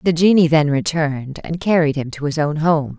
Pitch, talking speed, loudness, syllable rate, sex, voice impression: 155 Hz, 220 wpm, -17 LUFS, 5.2 syllables/s, female, feminine, slightly adult-like, slightly middle-aged, slightly thin, slightly relaxed, slightly weak, bright, slightly soft, clear, fluent, slightly cute, slightly cool, intellectual, slightly refreshing, sincere, calm, very friendly, elegant, slightly sweet, lively, modest